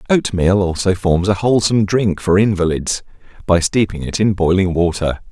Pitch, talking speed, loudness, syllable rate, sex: 95 Hz, 160 wpm, -16 LUFS, 5.2 syllables/s, male